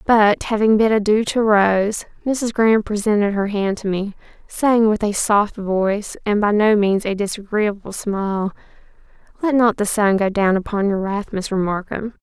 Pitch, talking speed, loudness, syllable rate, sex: 205 Hz, 170 wpm, -18 LUFS, 4.5 syllables/s, female